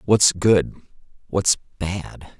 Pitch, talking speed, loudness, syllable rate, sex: 90 Hz, 100 wpm, -20 LUFS, 2.5 syllables/s, male